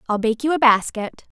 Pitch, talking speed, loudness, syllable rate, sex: 240 Hz, 215 wpm, -18 LUFS, 5.5 syllables/s, female